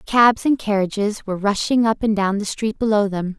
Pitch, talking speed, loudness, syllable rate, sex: 210 Hz, 210 wpm, -19 LUFS, 5.2 syllables/s, female